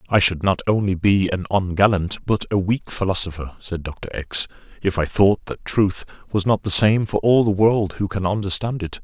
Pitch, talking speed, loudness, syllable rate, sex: 95 Hz, 205 wpm, -20 LUFS, 4.9 syllables/s, male